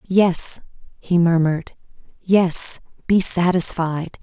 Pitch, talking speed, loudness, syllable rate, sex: 175 Hz, 70 wpm, -18 LUFS, 3.3 syllables/s, female